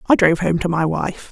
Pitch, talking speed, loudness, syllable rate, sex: 175 Hz, 275 wpm, -18 LUFS, 5.9 syllables/s, female